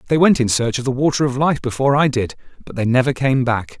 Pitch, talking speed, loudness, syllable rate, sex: 130 Hz, 270 wpm, -17 LUFS, 6.3 syllables/s, male